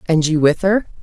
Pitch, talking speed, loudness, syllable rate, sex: 170 Hz, 235 wpm, -16 LUFS, 5.0 syllables/s, female